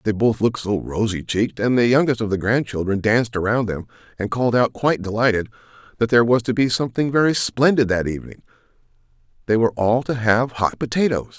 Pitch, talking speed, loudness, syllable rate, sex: 115 Hz, 190 wpm, -20 LUFS, 6.3 syllables/s, male